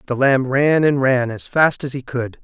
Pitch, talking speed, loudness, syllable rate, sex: 135 Hz, 245 wpm, -17 LUFS, 4.4 syllables/s, male